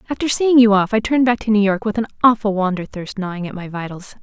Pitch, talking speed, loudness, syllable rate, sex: 210 Hz, 270 wpm, -17 LUFS, 6.6 syllables/s, female